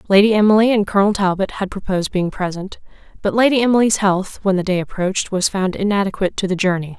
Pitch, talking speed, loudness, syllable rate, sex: 195 Hz, 195 wpm, -17 LUFS, 6.6 syllables/s, female